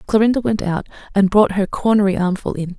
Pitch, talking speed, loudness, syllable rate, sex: 200 Hz, 195 wpm, -17 LUFS, 5.9 syllables/s, female